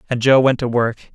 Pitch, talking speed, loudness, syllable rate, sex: 125 Hz, 265 wpm, -16 LUFS, 6.3 syllables/s, male